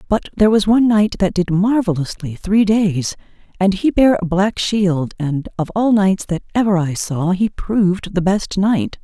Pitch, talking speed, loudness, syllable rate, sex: 195 Hz, 190 wpm, -17 LUFS, 4.5 syllables/s, female